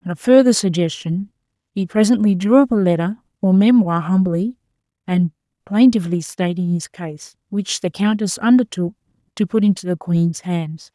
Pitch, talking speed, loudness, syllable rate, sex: 190 Hz, 155 wpm, -17 LUFS, 4.9 syllables/s, female